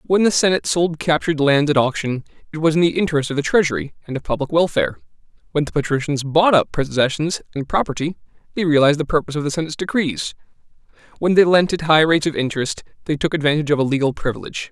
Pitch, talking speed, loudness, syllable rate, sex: 155 Hz, 210 wpm, -19 LUFS, 7.1 syllables/s, male